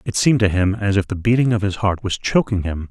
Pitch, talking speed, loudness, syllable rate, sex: 100 Hz, 290 wpm, -18 LUFS, 6.1 syllables/s, male